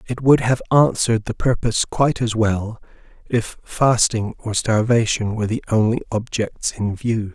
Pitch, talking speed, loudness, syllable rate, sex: 115 Hz, 155 wpm, -19 LUFS, 4.7 syllables/s, male